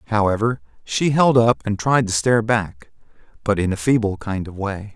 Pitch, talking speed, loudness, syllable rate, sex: 110 Hz, 195 wpm, -19 LUFS, 5.0 syllables/s, male